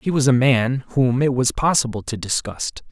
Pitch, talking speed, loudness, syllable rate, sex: 125 Hz, 205 wpm, -19 LUFS, 4.6 syllables/s, male